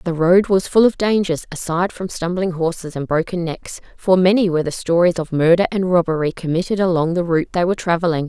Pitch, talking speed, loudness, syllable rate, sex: 175 Hz, 210 wpm, -18 LUFS, 6.0 syllables/s, female